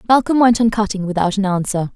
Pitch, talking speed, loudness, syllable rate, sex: 205 Hz, 215 wpm, -16 LUFS, 6.2 syllables/s, female